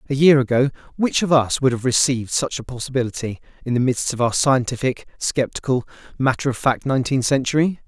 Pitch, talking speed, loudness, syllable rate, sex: 130 Hz, 185 wpm, -20 LUFS, 6.0 syllables/s, male